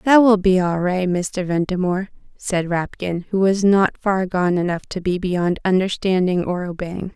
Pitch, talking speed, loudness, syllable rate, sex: 185 Hz, 175 wpm, -19 LUFS, 4.5 syllables/s, female